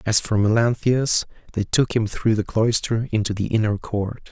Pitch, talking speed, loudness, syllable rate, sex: 110 Hz, 180 wpm, -21 LUFS, 4.6 syllables/s, male